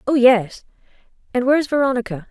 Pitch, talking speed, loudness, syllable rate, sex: 250 Hz, 130 wpm, -18 LUFS, 6.1 syllables/s, female